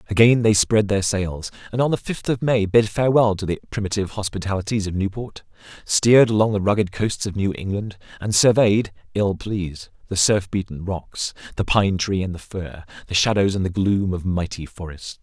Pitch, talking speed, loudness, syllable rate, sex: 100 Hz, 195 wpm, -21 LUFS, 5.3 syllables/s, male